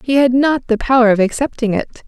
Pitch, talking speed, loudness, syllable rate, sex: 245 Hz, 230 wpm, -15 LUFS, 6.1 syllables/s, female